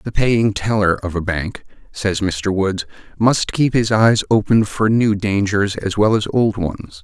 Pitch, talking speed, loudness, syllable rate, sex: 105 Hz, 190 wpm, -17 LUFS, 4.0 syllables/s, male